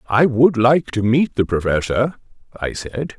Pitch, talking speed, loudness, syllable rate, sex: 125 Hz, 170 wpm, -18 LUFS, 4.2 syllables/s, male